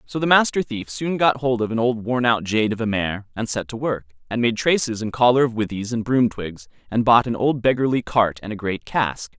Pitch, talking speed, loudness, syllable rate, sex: 115 Hz, 255 wpm, -21 LUFS, 5.3 syllables/s, male